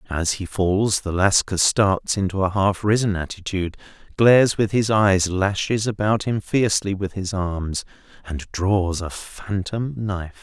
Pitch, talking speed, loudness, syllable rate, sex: 100 Hz, 155 wpm, -21 LUFS, 4.3 syllables/s, male